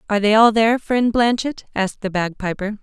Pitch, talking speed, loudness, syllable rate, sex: 215 Hz, 190 wpm, -18 LUFS, 5.9 syllables/s, female